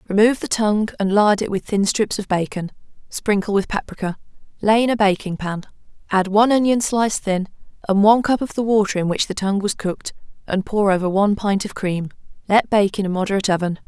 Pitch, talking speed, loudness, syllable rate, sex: 200 Hz, 210 wpm, -19 LUFS, 6.2 syllables/s, female